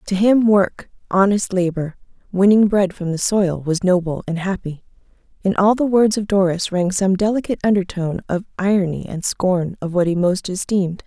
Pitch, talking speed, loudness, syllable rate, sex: 190 Hz, 175 wpm, -18 LUFS, 5.1 syllables/s, female